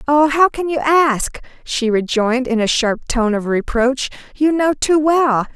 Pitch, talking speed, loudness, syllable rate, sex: 265 Hz, 185 wpm, -16 LUFS, 4.2 syllables/s, female